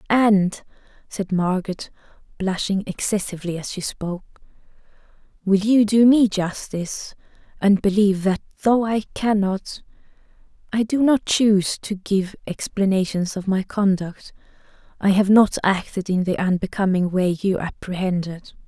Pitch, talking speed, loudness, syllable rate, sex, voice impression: 195 Hz, 120 wpm, -21 LUFS, 4.7 syllables/s, female, feminine, slightly young, relaxed, slightly weak, slightly dark, soft, slightly raspy, intellectual, calm, slightly friendly, reassuring, slightly unique, modest